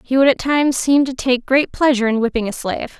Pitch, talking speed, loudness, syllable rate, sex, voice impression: 260 Hz, 260 wpm, -17 LUFS, 6.2 syllables/s, female, feminine, adult-like, tensed, slightly powerful, bright, soft, raspy, intellectual, friendly, reassuring, elegant, lively, kind